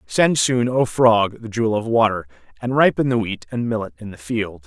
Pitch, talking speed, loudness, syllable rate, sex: 110 Hz, 220 wpm, -19 LUFS, 5.1 syllables/s, male